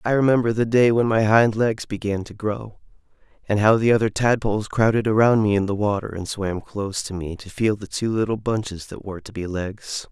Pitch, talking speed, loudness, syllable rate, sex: 105 Hz, 225 wpm, -21 LUFS, 5.4 syllables/s, male